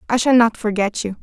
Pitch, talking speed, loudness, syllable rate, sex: 220 Hz, 245 wpm, -17 LUFS, 5.9 syllables/s, female